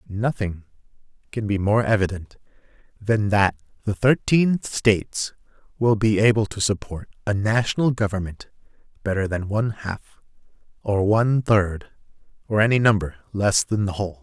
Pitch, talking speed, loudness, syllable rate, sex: 105 Hz, 135 wpm, -22 LUFS, 4.8 syllables/s, male